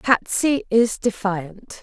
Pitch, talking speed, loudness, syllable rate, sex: 215 Hz, 100 wpm, -20 LUFS, 2.9 syllables/s, female